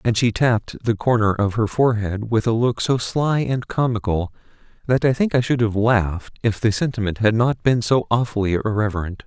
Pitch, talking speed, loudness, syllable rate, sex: 115 Hz, 200 wpm, -20 LUFS, 5.3 syllables/s, male